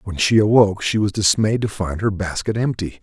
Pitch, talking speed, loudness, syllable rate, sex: 100 Hz, 220 wpm, -18 LUFS, 5.5 syllables/s, male